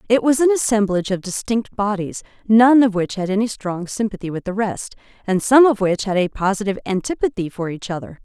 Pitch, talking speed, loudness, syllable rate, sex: 210 Hz, 205 wpm, -19 LUFS, 5.8 syllables/s, female